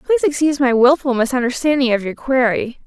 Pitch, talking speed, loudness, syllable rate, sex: 260 Hz, 165 wpm, -16 LUFS, 6.4 syllables/s, female